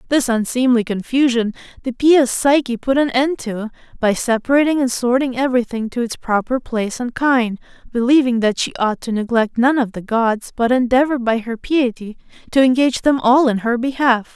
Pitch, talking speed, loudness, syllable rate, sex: 245 Hz, 180 wpm, -17 LUFS, 5.2 syllables/s, female